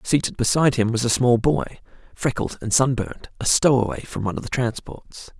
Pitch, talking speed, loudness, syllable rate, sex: 125 Hz, 190 wpm, -21 LUFS, 5.6 syllables/s, male